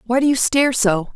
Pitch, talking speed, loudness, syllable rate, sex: 240 Hz, 260 wpm, -17 LUFS, 6.3 syllables/s, female